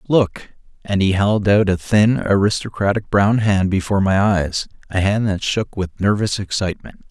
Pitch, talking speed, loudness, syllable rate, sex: 100 Hz, 170 wpm, -18 LUFS, 4.7 syllables/s, male